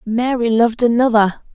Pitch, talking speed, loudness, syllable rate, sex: 230 Hz, 115 wpm, -15 LUFS, 5.2 syllables/s, female